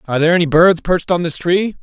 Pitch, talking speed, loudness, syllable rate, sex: 170 Hz, 265 wpm, -14 LUFS, 7.4 syllables/s, male